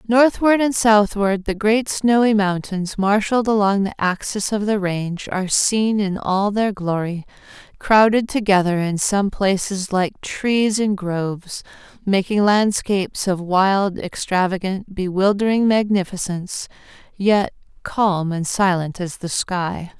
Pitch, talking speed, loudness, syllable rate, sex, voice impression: 200 Hz, 130 wpm, -19 LUFS, 4.0 syllables/s, female, very feminine, adult-like, slightly soft, slightly intellectual, slightly calm, slightly kind